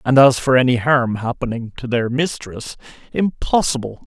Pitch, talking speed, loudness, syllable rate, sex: 125 Hz, 130 wpm, -18 LUFS, 4.8 syllables/s, male